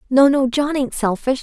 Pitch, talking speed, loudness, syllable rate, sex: 265 Hz, 210 wpm, -17 LUFS, 4.9 syllables/s, female